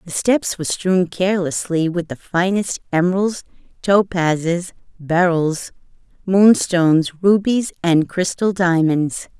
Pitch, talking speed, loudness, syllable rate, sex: 175 Hz, 100 wpm, -18 LUFS, 4.0 syllables/s, female